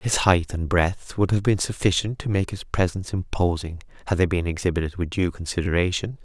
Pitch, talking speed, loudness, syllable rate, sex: 90 Hz, 190 wpm, -24 LUFS, 5.6 syllables/s, male